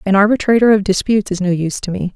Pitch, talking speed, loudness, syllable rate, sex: 200 Hz, 250 wpm, -15 LUFS, 7.4 syllables/s, female